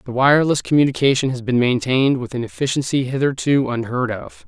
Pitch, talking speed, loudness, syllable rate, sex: 130 Hz, 160 wpm, -18 LUFS, 6.0 syllables/s, male